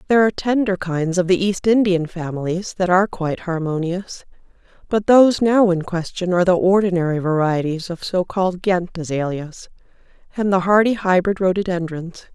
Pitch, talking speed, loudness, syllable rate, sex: 180 Hz, 150 wpm, -19 LUFS, 5.4 syllables/s, female